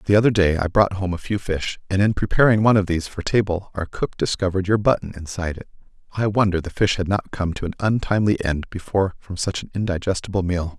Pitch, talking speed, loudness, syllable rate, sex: 95 Hz, 220 wpm, -21 LUFS, 6.5 syllables/s, male